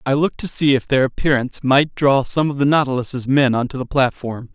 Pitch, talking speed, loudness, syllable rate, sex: 135 Hz, 225 wpm, -18 LUFS, 5.7 syllables/s, male